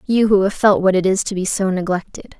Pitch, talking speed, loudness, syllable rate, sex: 195 Hz, 275 wpm, -17 LUFS, 5.8 syllables/s, female